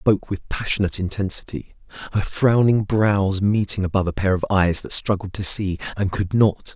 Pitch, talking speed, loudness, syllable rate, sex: 100 Hz, 185 wpm, -20 LUFS, 5.4 syllables/s, male